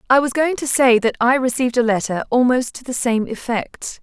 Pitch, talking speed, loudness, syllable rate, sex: 250 Hz, 225 wpm, -18 LUFS, 5.4 syllables/s, female